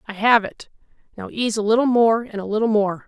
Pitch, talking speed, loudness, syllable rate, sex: 215 Hz, 235 wpm, -19 LUFS, 5.7 syllables/s, female